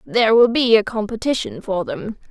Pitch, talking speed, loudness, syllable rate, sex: 215 Hz, 180 wpm, -18 LUFS, 5.2 syllables/s, female